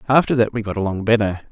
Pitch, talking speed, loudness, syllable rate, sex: 110 Hz, 235 wpm, -19 LUFS, 7.0 syllables/s, male